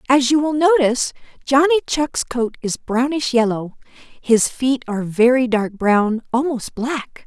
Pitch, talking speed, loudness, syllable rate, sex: 255 Hz, 150 wpm, -18 LUFS, 4.1 syllables/s, female